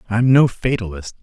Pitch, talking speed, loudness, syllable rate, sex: 110 Hz, 145 wpm, -16 LUFS, 5.1 syllables/s, male